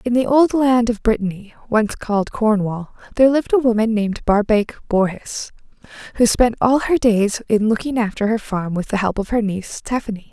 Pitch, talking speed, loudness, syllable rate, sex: 225 Hz, 190 wpm, -18 LUFS, 5.5 syllables/s, female